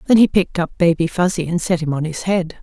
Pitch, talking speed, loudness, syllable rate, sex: 175 Hz, 275 wpm, -18 LUFS, 6.5 syllables/s, female